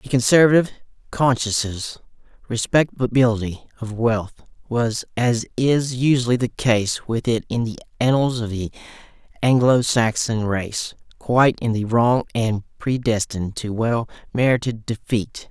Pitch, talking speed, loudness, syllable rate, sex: 120 Hz, 125 wpm, -20 LUFS, 4.5 syllables/s, male